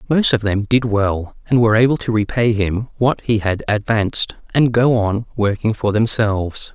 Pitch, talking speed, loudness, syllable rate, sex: 110 Hz, 185 wpm, -17 LUFS, 4.9 syllables/s, male